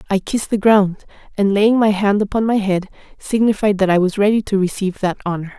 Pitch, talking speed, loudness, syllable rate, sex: 200 Hz, 215 wpm, -17 LUFS, 6.0 syllables/s, female